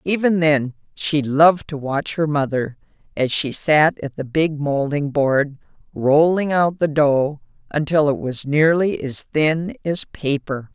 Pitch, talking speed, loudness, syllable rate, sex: 150 Hz, 155 wpm, -19 LUFS, 3.9 syllables/s, female